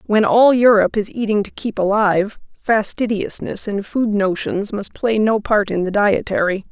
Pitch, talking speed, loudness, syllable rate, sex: 210 Hz, 170 wpm, -17 LUFS, 4.8 syllables/s, female